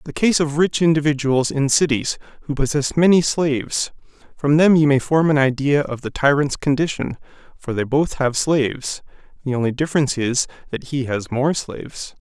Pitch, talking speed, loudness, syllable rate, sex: 145 Hz, 175 wpm, -19 LUFS, 5.2 syllables/s, male